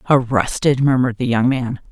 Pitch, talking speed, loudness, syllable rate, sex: 125 Hz, 155 wpm, -17 LUFS, 5.5 syllables/s, female